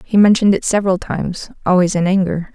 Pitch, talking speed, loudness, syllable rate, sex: 190 Hz, 190 wpm, -16 LUFS, 6.5 syllables/s, female